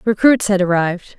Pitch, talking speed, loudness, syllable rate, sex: 200 Hz, 150 wpm, -15 LUFS, 5.5 syllables/s, female